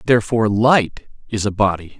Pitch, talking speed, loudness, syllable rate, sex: 105 Hz, 150 wpm, -17 LUFS, 5.5 syllables/s, male